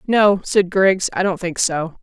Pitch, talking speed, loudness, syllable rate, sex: 185 Hz, 205 wpm, -17 LUFS, 3.8 syllables/s, female